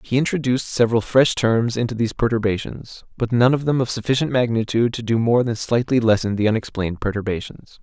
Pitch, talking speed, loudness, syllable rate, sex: 115 Hz, 185 wpm, -20 LUFS, 6.2 syllables/s, male